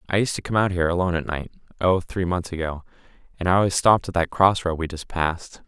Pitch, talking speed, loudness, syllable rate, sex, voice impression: 90 Hz, 255 wpm, -22 LUFS, 6.7 syllables/s, male, masculine, adult-like, slightly middle-aged, thick, slightly tensed, slightly weak, slightly dark, slightly soft, slightly clear, fluent, cool, intellectual, refreshing, very sincere, very calm, mature, very friendly, very reassuring, slightly unique, elegant, sweet, slightly lively, very kind, modest